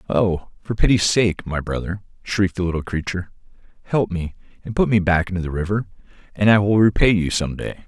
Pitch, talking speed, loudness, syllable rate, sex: 95 Hz, 200 wpm, -20 LUFS, 5.8 syllables/s, male